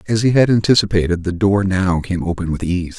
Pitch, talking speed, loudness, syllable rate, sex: 95 Hz, 220 wpm, -16 LUFS, 5.7 syllables/s, male